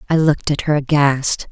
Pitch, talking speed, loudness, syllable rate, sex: 145 Hz, 195 wpm, -16 LUFS, 5.3 syllables/s, female